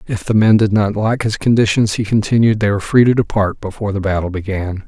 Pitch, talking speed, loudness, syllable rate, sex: 105 Hz, 235 wpm, -15 LUFS, 6.1 syllables/s, male